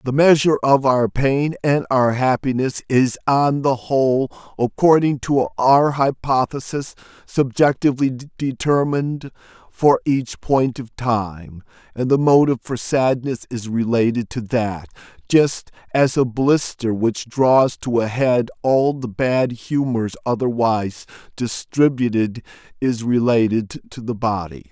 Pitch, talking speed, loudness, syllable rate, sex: 125 Hz, 125 wpm, -19 LUFS, 4.0 syllables/s, male